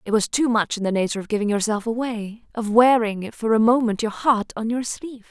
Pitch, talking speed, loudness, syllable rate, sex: 225 Hz, 225 wpm, -21 LUFS, 5.9 syllables/s, female